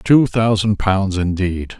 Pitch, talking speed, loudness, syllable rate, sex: 100 Hz, 135 wpm, -17 LUFS, 3.4 syllables/s, male